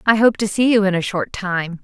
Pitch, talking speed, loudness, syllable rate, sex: 200 Hz, 295 wpm, -18 LUFS, 5.3 syllables/s, female